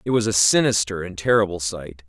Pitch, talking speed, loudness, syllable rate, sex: 95 Hz, 200 wpm, -20 LUFS, 5.6 syllables/s, male